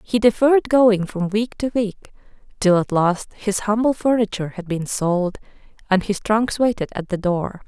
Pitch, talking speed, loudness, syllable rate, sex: 205 Hz, 180 wpm, -20 LUFS, 4.8 syllables/s, female